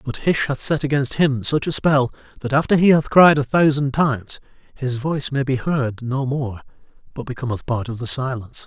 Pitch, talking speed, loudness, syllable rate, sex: 135 Hz, 210 wpm, -19 LUFS, 5.3 syllables/s, male